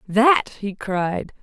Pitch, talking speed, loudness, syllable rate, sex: 215 Hz, 125 wpm, -20 LUFS, 2.6 syllables/s, female